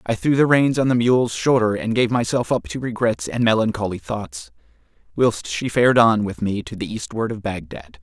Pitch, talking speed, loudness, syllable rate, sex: 110 Hz, 210 wpm, -20 LUFS, 5.2 syllables/s, male